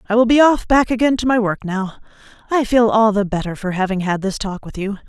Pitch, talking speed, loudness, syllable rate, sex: 215 Hz, 260 wpm, -17 LUFS, 6.0 syllables/s, female